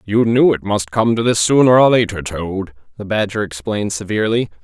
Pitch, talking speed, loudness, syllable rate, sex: 105 Hz, 195 wpm, -16 LUFS, 5.5 syllables/s, male